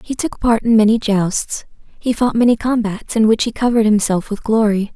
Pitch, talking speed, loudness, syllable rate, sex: 220 Hz, 205 wpm, -16 LUFS, 5.3 syllables/s, female